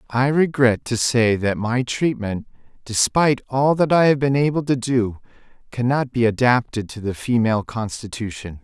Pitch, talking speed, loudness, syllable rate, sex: 120 Hz, 160 wpm, -20 LUFS, 4.8 syllables/s, male